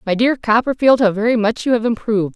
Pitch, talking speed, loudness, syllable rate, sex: 225 Hz, 230 wpm, -16 LUFS, 6.1 syllables/s, female